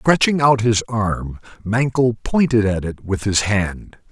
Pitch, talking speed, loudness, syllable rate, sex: 110 Hz, 160 wpm, -18 LUFS, 3.8 syllables/s, male